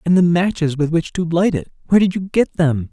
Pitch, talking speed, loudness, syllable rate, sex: 170 Hz, 245 wpm, -17 LUFS, 5.8 syllables/s, male